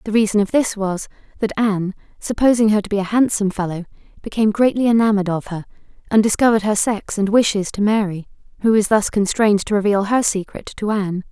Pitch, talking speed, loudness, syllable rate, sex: 210 Hz, 195 wpm, -18 LUFS, 6.4 syllables/s, female